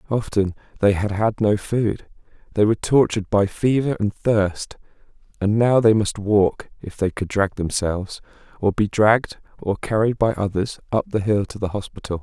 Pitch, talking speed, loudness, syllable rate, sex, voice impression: 105 Hz, 175 wpm, -21 LUFS, 4.9 syllables/s, male, masculine, adult-like, relaxed, slightly weak, slightly soft, raspy, cool, intellectual, mature, friendly, reassuring, wild, kind